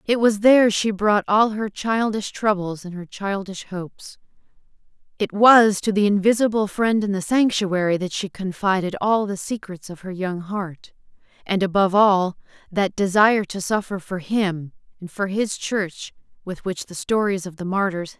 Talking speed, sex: 180 wpm, female